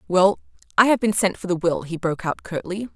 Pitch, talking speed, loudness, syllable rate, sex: 190 Hz, 245 wpm, -22 LUFS, 5.9 syllables/s, female